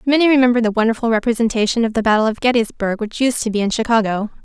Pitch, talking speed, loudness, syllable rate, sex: 230 Hz, 215 wpm, -17 LUFS, 7.1 syllables/s, female